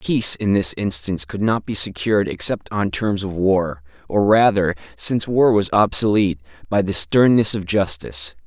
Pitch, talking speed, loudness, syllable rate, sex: 95 Hz, 155 wpm, -19 LUFS, 5.1 syllables/s, male